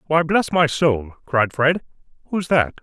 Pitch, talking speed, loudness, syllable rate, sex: 145 Hz, 170 wpm, -19 LUFS, 4.0 syllables/s, male